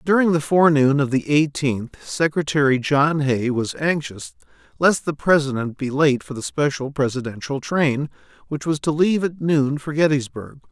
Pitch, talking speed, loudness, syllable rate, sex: 145 Hz, 160 wpm, -20 LUFS, 4.7 syllables/s, male